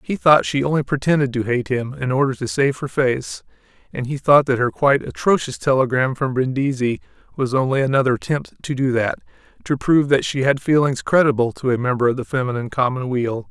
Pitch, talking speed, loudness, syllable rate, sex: 135 Hz, 195 wpm, -19 LUFS, 5.9 syllables/s, male